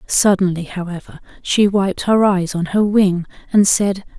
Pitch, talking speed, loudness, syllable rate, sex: 190 Hz, 160 wpm, -16 LUFS, 4.3 syllables/s, female